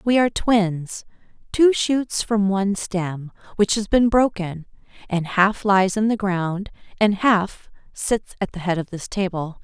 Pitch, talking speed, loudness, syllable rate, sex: 200 Hz, 170 wpm, -21 LUFS, 4.0 syllables/s, female